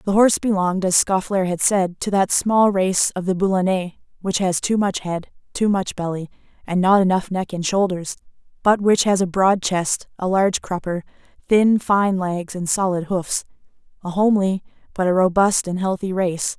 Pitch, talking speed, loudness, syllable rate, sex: 190 Hz, 180 wpm, -20 LUFS, 5.0 syllables/s, female